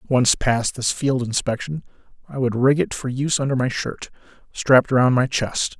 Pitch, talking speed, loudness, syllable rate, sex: 130 Hz, 185 wpm, -20 LUFS, 5.0 syllables/s, male